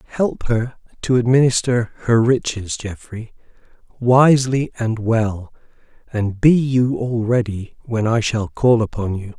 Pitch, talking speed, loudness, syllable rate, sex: 115 Hz, 135 wpm, -18 LUFS, 4.0 syllables/s, male